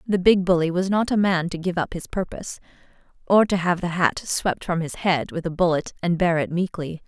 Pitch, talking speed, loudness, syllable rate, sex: 175 Hz, 235 wpm, -22 LUFS, 5.4 syllables/s, female